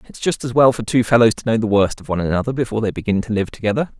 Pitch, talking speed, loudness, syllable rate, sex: 115 Hz, 300 wpm, -18 LUFS, 7.8 syllables/s, male